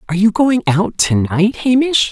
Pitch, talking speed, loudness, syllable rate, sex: 210 Hz, 200 wpm, -14 LUFS, 4.8 syllables/s, female